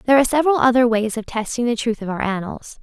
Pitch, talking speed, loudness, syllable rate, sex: 235 Hz, 255 wpm, -19 LUFS, 7.1 syllables/s, female